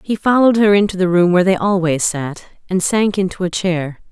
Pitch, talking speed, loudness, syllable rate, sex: 185 Hz, 220 wpm, -15 LUFS, 5.6 syllables/s, female